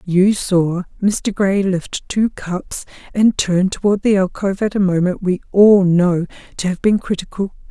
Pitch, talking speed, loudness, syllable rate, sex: 190 Hz, 170 wpm, -17 LUFS, 4.2 syllables/s, female